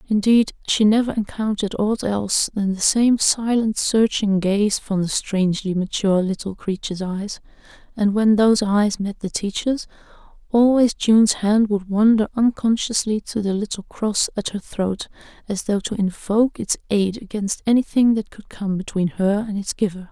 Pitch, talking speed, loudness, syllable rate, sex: 210 Hz, 165 wpm, -20 LUFS, 4.8 syllables/s, female